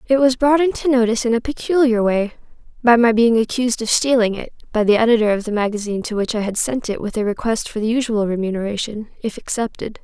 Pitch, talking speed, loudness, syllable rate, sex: 230 Hz, 215 wpm, -18 LUFS, 6.4 syllables/s, female